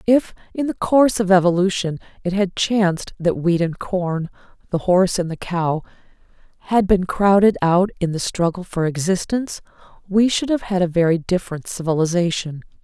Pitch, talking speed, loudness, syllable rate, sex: 185 Hz, 165 wpm, -19 LUFS, 5.2 syllables/s, female